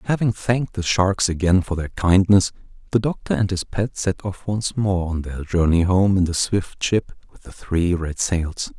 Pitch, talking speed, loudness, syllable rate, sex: 95 Hz, 205 wpm, -21 LUFS, 4.5 syllables/s, male